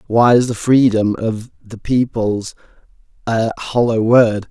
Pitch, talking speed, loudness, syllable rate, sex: 115 Hz, 135 wpm, -15 LUFS, 4.0 syllables/s, male